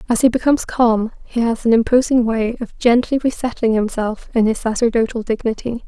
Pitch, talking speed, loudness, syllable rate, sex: 235 Hz, 175 wpm, -17 LUFS, 5.5 syllables/s, female